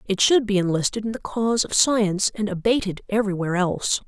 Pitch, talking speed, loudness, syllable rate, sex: 205 Hz, 190 wpm, -22 LUFS, 6.2 syllables/s, female